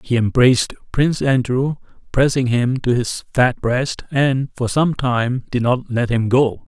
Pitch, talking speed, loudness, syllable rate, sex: 125 Hz, 170 wpm, -18 LUFS, 4.1 syllables/s, male